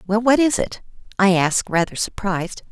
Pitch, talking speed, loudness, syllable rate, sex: 200 Hz, 175 wpm, -19 LUFS, 5.6 syllables/s, female